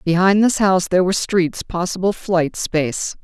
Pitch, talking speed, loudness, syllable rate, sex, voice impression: 185 Hz, 165 wpm, -18 LUFS, 5.3 syllables/s, female, feminine, very adult-like, slightly powerful, intellectual, calm, slightly strict